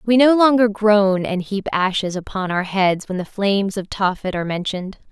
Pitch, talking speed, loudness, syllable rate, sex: 200 Hz, 200 wpm, -19 LUFS, 5.1 syllables/s, female